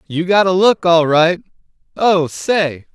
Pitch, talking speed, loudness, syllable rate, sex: 175 Hz, 165 wpm, -14 LUFS, 3.7 syllables/s, male